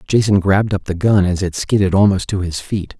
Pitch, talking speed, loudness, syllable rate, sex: 95 Hz, 240 wpm, -16 LUFS, 5.7 syllables/s, male